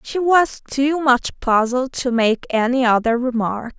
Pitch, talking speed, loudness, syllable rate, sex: 250 Hz, 160 wpm, -18 LUFS, 4.0 syllables/s, female